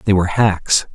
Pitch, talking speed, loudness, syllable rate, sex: 95 Hz, 190 wpm, -16 LUFS, 5.3 syllables/s, male